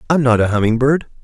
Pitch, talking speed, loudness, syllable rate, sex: 125 Hz, 240 wpm, -15 LUFS, 6.5 syllables/s, male